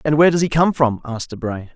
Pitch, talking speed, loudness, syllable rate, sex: 140 Hz, 275 wpm, -18 LUFS, 7.0 syllables/s, male